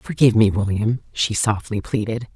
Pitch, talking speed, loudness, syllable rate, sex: 110 Hz, 155 wpm, -20 LUFS, 5.0 syllables/s, female